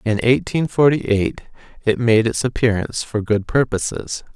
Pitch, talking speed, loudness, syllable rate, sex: 115 Hz, 150 wpm, -19 LUFS, 4.7 syllables/s, male